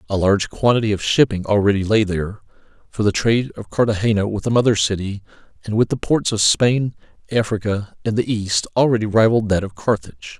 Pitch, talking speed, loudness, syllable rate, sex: 105 Hz, 185 wpm, -19 LUFS, 6.0 syllables/s, male